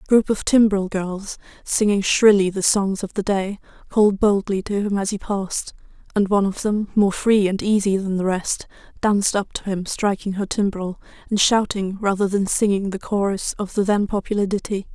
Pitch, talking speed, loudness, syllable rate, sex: 200 Hz, 195 wpm, -20 LUFS, 5.1 syllables/s, female